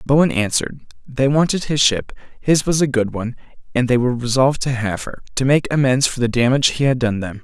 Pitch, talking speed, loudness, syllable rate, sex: 130 Hz, 225 wpm, -18 LUFS, 6.2 syllables/s, male